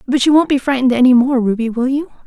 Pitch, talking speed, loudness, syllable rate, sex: 260 Hz, 265 wpm, -14 LUFS, 7.1 syllables/s, female